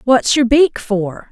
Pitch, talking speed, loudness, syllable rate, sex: 245 Hz, 185 wpm, -14 LUFS, 3.4 syllables/s, female